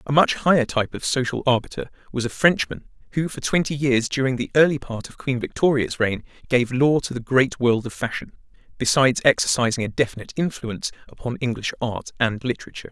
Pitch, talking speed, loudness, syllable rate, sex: 130 Hz, 185 wpm, -22 LUFS, 6.1 syllables/s, male